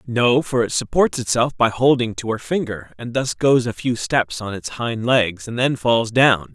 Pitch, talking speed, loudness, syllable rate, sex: 120 Hz, 220 wpm, -19 LUFS, 4.4 syllables/s, male